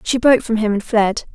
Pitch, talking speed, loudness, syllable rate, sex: 220 Hz, 270 wpm, -16 LUFS, 5.8 syllables/s, female